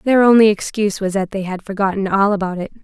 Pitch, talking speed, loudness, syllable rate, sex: 200 Hz, 235 wpm, -16 LUFS, 6.5 syllables/s, female